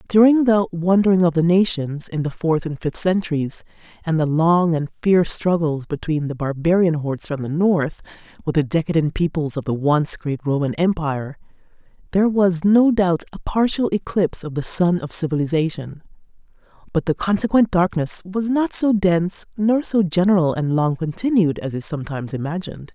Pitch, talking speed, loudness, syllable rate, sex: 170 Hz, 170 wpm, -19 LUFS, 5.3 syllables/s, female